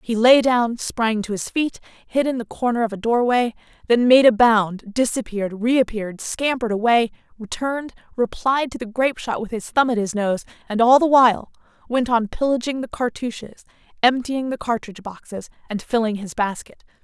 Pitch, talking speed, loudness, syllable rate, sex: 235 Hz, 185 wpm, -20 LUFS, 5.3 syllables/s, female